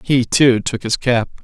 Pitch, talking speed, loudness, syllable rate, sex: 120 Hz, 210 wpm, -16 LUFS, 4.1 syllables/s, male